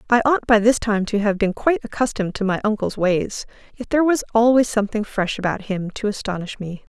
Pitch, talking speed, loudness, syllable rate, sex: 215 Hz, 215 wpm, -20 LUFS, 6.0 syllables/s, female